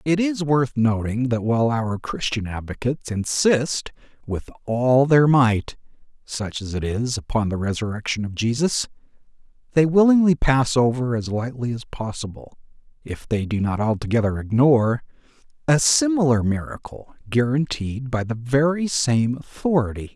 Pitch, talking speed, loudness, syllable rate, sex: 125 Hz, 135 wpm, -21 LUFS, 4.7 syllables/s, male